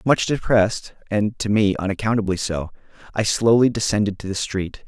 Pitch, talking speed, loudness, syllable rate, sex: 105 Hz, 160 wpm, -21 LUFS, 5.3 syllables/s, male